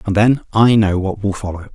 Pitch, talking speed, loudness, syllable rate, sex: 105 Hz, 240 wpm, -15 LUFS, 5.5 syllables/s, male